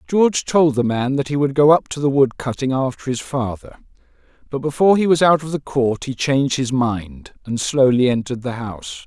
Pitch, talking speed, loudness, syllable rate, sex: 135 Hz, 220 wpm, -18 LUFS, 5.5 syllables/s, male